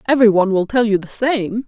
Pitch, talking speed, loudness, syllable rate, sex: 220 Hz, 250 wpm, -16 LUFS, 6.5 syllables/s, female